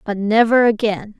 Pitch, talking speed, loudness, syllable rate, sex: 220 Hz, 150 wpm, -16 LUFS, 4.6 syllables/s, female